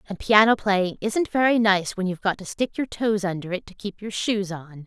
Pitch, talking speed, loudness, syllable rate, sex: 200 Hz, 245 wpm, -23 LUFS, 5.2 syllables/s, female